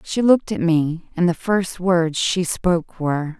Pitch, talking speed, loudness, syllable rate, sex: 175 Hz, 195 wpm, -20 LUFS, 4.3 syllables/s, female